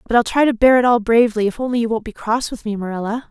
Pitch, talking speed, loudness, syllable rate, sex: 230 Hz, 310 wpm, -17 LUFS, 7.0 syllables/s, female